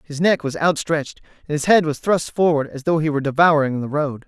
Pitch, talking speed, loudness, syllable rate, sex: 155 Hz, 240 wpm, -19 LUFS, 5.9 syllables/s, male